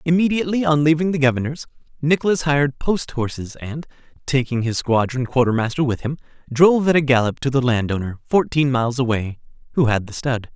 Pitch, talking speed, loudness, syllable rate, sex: 140 Hz, 170 wpm, -19 LUFS, 5.9 syllables/s, male